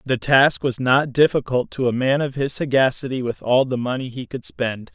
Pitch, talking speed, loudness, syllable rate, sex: 130 Hz, 220 wpm, -20 LUFS, 5.0 syllables/s, male